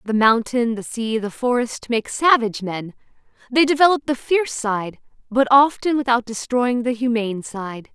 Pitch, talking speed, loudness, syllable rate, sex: 240 Hz, 160 wpm, -19 LUFS, 4.8 syllables/s, female